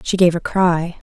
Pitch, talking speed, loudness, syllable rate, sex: 175 Hz, 215 wpm, -17 LUFS, 4.3 syllables/s, female